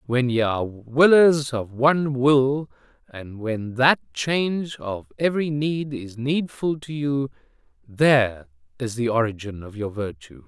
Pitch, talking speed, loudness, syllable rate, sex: 125 Hz, 145 wpm, -22 LUFS, 4.1 syllables/s, male